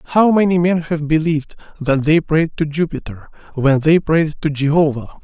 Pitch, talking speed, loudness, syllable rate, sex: 155 Hz, 170 wpm, -16 LUFS, 4.9 syllables/s, male